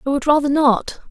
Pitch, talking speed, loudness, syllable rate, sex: 280 Hz, 215 wpm, -17 LUFS, 5.6 syllables/s, female